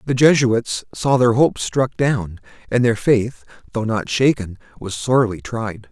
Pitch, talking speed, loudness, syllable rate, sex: 120 Hz, 160 wpm, -18 LUFS, 4.3 syllables/s, male